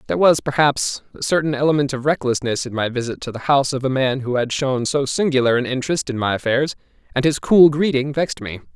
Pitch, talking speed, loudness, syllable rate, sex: 135 Hz, 225 wpm, -19 LUFS, 6.2 syllables/s, male